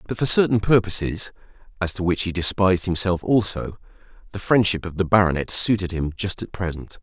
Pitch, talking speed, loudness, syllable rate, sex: 95 Hz, 160 wpm, -21 LUFS, 5.7 syllables/s, male